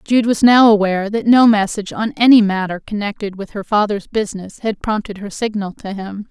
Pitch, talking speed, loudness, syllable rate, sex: 210 Hz, 200 wpm, -16 LUFS, 5.5 syllables/s, female